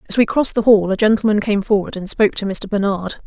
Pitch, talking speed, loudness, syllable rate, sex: 205 Hz, 255 wpm, -16 LUFS, 6.6 syllables/s, female